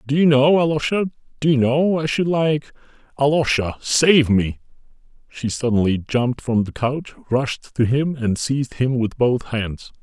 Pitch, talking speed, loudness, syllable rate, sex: 135 Hz, 160 wpm, -19 LUFS, 4.6 syllables/s, male